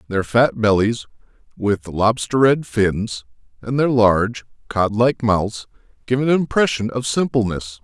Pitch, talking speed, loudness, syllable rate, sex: 115 Hz, 145 wpm, -19 LUFS, 4.2 syllables/s, male